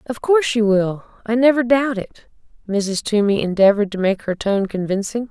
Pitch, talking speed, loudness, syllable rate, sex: 215 Hz, 170 wpm, -18 LUFS, 5.2 syllables/s, female